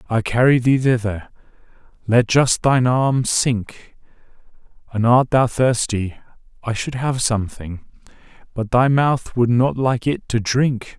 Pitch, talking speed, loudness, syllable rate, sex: 120 Hz, 135 wpm, -18 LUFS, 4.0 syllables/s, male